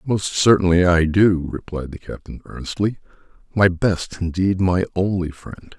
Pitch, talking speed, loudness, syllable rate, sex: 90 Hz, 145 wpm, -19 LUFS, 4.5 syllables/s, male